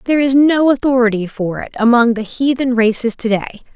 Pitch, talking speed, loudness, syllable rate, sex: 240 Hz, 190 wpm, -14 LUFS, 5.7 syllables/s, female